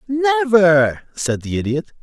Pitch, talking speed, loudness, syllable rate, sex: 190 Hz, 120 wpm, -17 LUFS, 3.6 syllables/s, male